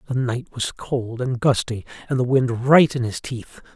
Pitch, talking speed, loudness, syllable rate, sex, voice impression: 125 Hz, 210 wpm, -21 LUFS, 4.4 syllables/s, male, masculine, middle-aged, slightly tensed, powerful, slightly hard, muffled, slightly raspy, cool, intellectual, slightly mature, wild, lively, strict, sharp